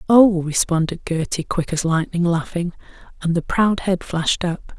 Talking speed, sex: 165 wpm, female